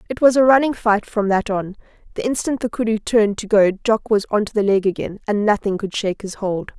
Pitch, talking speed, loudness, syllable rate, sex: 215 Hz, 250 wpm, -19 LUFS, 5.8 syllables/s, female